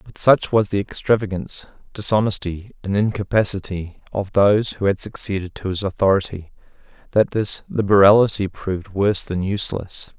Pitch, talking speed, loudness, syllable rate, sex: 100 Hz, 135 wpm, -20 LUFS, 5.4 syllables/s, male